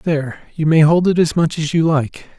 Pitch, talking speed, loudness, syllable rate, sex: 155 Hz, 250 wpm, -15 LUFS, 5.1 syllables/s, male